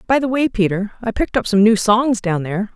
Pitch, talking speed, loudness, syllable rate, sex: 215 Hz, 260 wpm, -17 LUFS, 6.1 syllables/s, female